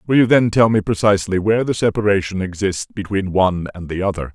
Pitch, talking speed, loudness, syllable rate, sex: 100 Hz, 205 wpm, -18 LUFS, 6.4 syllables/s, male